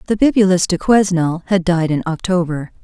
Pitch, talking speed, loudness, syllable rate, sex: 180 Hz, 170 wpm, -16 LUFS, 5.3 syllables/s, female